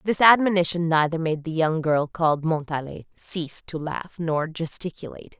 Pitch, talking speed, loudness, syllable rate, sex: 165 Hz, 155 wpm, -23 LUFS, 5.1 syllables/s, female